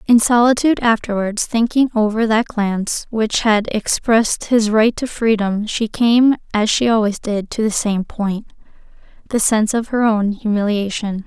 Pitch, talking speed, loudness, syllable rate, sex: 220 Hz, 155 wpm, -17 LUFS, 4.6 syllables/s, female